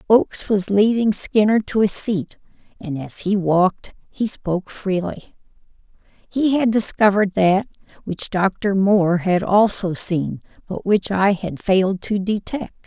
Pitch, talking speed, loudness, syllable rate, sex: 195 Hz, 145 wpm, -19 LUFS, 4.2 syllables/s, female